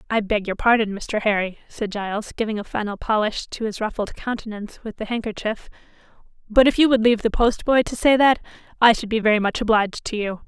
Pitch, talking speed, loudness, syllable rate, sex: 220 Hz, 210 wpm, -21 LUFS, 6.1 syllables/s, female